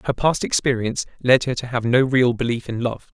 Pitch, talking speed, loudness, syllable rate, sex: 125 Hz, 225 wpm, -20 LUFS, 5.7 syllables/s, male